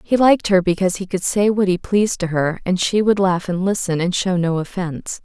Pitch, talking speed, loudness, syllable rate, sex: 185 Hz, 250 wpm, -18 LUFS, 5.7 syllables/s, female